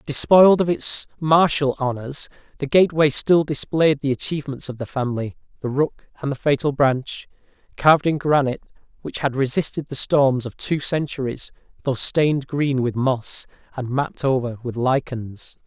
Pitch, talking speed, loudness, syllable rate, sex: 140 Hz, 150 wpm, -20 LUFS, 5.0 syllables/s, male